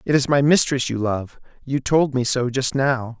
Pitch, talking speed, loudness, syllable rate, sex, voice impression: 130 Hz, 225 wpm, -20 LUFS, 4.6 syllables/s, male, masculine, slightly adult-like, slightly relaxed, slightly bright, soft, refreshing, calm, friendly, unique, kind, slightly modest